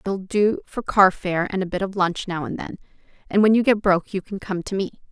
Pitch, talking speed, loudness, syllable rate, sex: 190 Hz, 270 wpm, -21 LUFS, 5.6 syllables/s, female